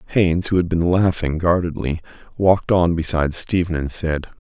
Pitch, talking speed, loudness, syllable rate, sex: 85 Hz, 160 wpm, -19 LUFS, 5.4 syllables/s, male